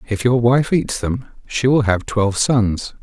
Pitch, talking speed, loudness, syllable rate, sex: 115 Hz, 200 wpm, -18 LUFS, 4.1 syllables/s, male